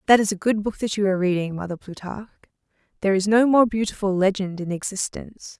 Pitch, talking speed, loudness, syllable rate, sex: 200 Hz, 205 wpm, -22 LUFS, 6.6 syllables/s, female